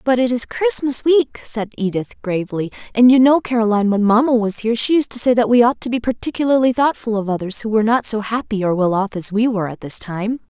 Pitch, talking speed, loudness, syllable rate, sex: 230 Hz, 245 wpm, -17 LUFS, 6.1 syllables/s, female